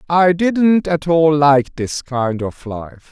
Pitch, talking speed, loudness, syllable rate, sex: 150 Hz, 195 wpm, -15 LUFS, 3.4 syllables/s, male